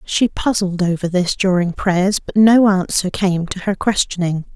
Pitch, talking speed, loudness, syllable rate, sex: 190 Hz, 170 wpm, -17 LUFS, 4.3 syllables/s, female